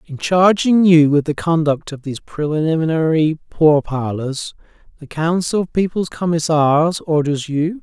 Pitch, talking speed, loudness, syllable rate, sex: 160 Hz, 130 wpm, -17 LUFS, 4.3 syllables/s, male